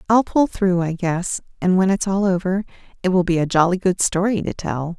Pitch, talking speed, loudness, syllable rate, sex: 185 Hz, 230 wpm, -20 LUFS, 5.2 syllables/s, female